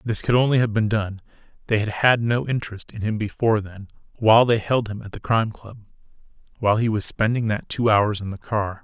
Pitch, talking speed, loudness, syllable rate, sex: 110 Hz, 210 wpm, -21 LUFS, 6.0 syllables/s, male